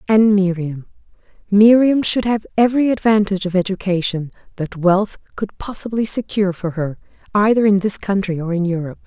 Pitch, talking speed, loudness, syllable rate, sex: 195 Hz, 145 wpm, -17 LUFS, 5.6 syllables/s, female